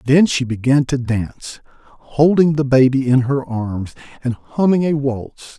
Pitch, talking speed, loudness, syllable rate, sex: 130 Hz, 160 wpm, -17 LUFS, 4.3 syllables/s, male